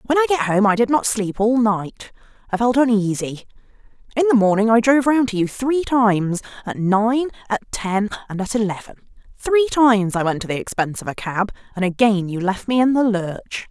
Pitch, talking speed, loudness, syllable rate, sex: 220 Hz, 210 wpm, -19 LUFS, 5.3 syllables/s, female